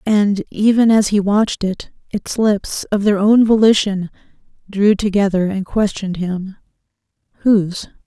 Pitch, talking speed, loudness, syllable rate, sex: 200 Hz, 125 wpm, -16 LUFS, 4.5 syllables/s, female